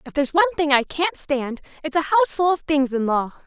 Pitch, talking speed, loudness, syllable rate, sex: 300 Hz, 240 wpm, -21 LUFS, 6.8 syllables/s, female